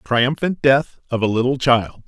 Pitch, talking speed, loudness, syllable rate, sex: 130 Hz, 175 wpm, -18 LUFS, 4.4 syllables/s, male